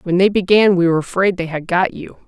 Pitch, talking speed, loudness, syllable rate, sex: 180 Hz, 265 wpm, -16 LUFS, 6.2 syllables/s, female